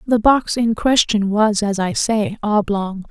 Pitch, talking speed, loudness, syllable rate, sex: 210 Hz, 175 wpm, -17 LUFS, 3.8 syllables/s, female